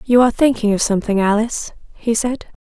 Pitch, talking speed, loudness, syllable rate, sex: 225 Hz, 180 wpm, -17 LUFS, 6.2 syllables/s, female